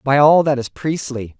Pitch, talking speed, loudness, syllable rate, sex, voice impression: 135 Hz, 215 wpm, -17 LUFS, 3.9 syllables/s, male, masculine, adult-like, slightly tensed, slightly bright, slightly muffled, slightly raspy, intellectual, calm, friendly, wild, lively, slightly kind, slightly modest